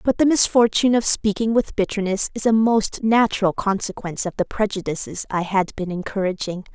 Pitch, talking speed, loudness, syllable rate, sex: 205 Hz, 170 wpm, -20 LUFS, 5.6 syllables/s, female